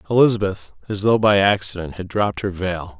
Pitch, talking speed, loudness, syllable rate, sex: 95 Hz, 180 wpm, -19 LUFS, 5.7 syllables/s, male